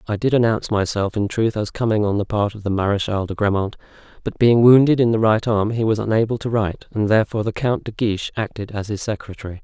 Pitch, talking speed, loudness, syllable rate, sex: 105 Hz, 235 wpm, -19 LUFS, 6.4 syllables/s, male